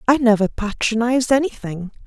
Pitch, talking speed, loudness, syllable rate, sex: 230 Hz, 115 wpm, -19 LUFS, 5.6 syllables/s, female